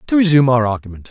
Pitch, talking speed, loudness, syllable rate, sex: 135 Hz, 215 wpm, -14 LUFS, 8.3 syllables/s, male